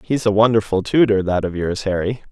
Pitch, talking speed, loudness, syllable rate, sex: 105 Hz, 205 wpm, -18 LUFS, 5.6 syllables/s, male